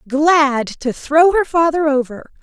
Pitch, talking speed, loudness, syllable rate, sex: 295 Hz, 150 wpm, -15 LUFS, 3.6 syllables/s, female